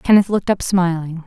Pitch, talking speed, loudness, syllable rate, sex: 180 Hz, 190 wpm, -17 LUFS, 5.7 syllables/s, female